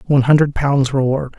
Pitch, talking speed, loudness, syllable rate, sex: 135 Hz, 175 wpm, -15 LUFS, 5.8 syllables/s, male